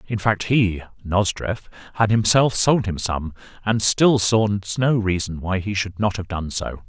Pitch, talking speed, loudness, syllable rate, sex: 100 Hz, 185 wpm, -20 LUFS, 4.5 syllables/s, male